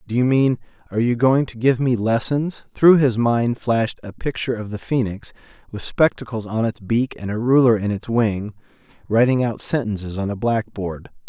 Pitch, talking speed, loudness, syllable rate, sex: 115 Hz, 180 wpm, -20 LUFS, 4.0 syllables/s, male